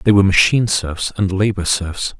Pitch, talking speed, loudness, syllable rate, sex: 95 Hz, 190 wpm, -16 LUFS, 5.5 syllables/s, male